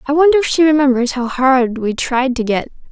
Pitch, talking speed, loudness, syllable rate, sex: 270 Hz, 225 wpm, -14 LUFS, 5.4 syllables/s, female